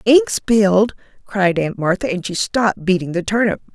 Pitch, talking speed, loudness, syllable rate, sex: 200 Hz, 175 wpm, -17 LUFS, 5.0 syllables/s, female